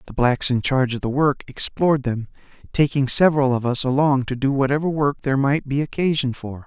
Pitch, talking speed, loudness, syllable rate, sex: 135 Hz, 205 wpm, -20 LUFS, 5.9 syllables/s, male